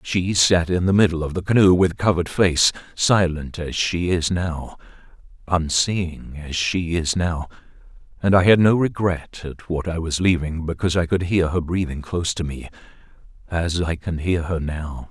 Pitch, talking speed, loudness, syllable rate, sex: 85 Hz, 175 wpm, -20 LUFS, 4.6 syllables/s, male